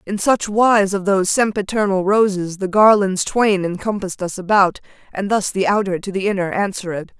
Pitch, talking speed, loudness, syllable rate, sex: 195 Hz, 175 wpm, -17 LUFS, 5.2 syllables/s, female